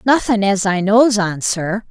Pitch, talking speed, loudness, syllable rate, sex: 205 Hz, 190 wpm, -15 LUFS, 4.0 syllables/s, female